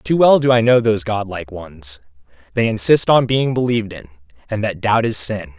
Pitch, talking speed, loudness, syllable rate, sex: 105 Hz, 205 wpm, -16 LUFS, 5.5 syllables/s, male